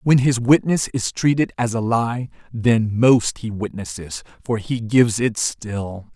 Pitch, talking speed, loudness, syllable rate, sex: 115 Hz, 165 wpm, -20 LUFS, 4.0 syllables/s, male